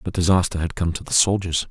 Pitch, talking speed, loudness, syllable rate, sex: 90 Hz, 245 wpm, -20 LUFS, 6.2 syllables/s, male